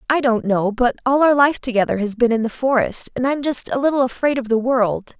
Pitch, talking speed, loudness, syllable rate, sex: 250 Hz, 255 wpm, -18 LUFS, 5.5 syllables/s, female